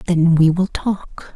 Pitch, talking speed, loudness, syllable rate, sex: 175 Hz, 180 wpm, -17 LUFS, 3.4 syllables/s, female